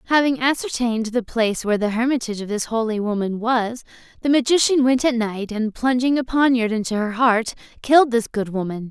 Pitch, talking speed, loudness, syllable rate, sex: 235 Hz, 190 wpm, -20 LUFS, 5.7 syllables/s, female